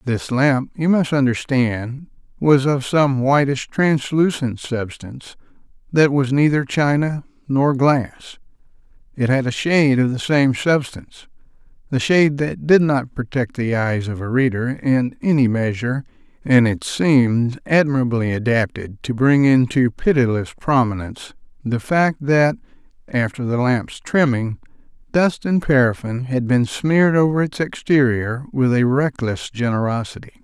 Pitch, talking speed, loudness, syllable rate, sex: 130 Hz, 135 wpm, -18 LUFS, 4.4 syllables/s, male